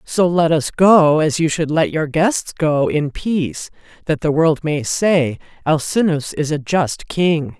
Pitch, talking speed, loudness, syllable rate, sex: 160 Hz, 180 wpm, -17 LUFS, 3.8 syllables/s, female